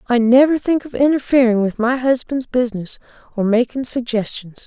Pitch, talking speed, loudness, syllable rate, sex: 245 Hz, 155 wpm, -17 LUFS, 5.3 syllables/s, female